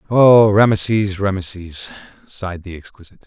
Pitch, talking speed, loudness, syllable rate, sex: 100 Hz, 110 wpm, -15 LUFS, 5.2 syllables/s, male